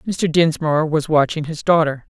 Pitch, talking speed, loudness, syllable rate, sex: 155 Hz, 165 wpm, -18 LUFS, 4.9 syllables/s, female